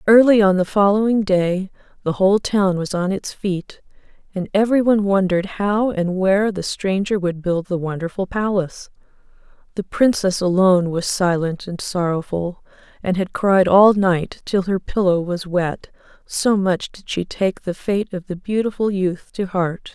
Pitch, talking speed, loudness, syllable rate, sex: 190 Hz, 165 wpm, -19 LUFS, 4.6 syllables/s, female